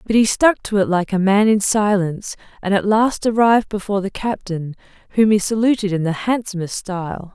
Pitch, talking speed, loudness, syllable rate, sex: 200 Hz, 195 wpm, -18 LUFS, 5.5 syllables/s, female